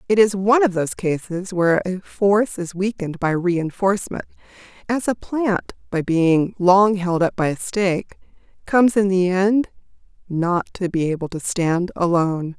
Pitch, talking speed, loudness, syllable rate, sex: 185 Hz, 160 wpm, -20 LUFS, 4.8 syllables/s, female